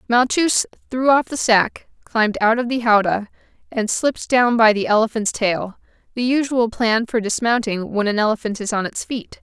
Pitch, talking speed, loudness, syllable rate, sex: 230 Hz, 185 wpm, -19 LUFS, 5.0 syllables/s, female